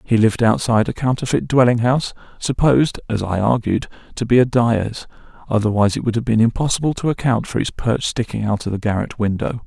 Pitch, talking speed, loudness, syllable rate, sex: 115 Hz, 200 wpm, -18 LUFS, 6.0 syllables/s, male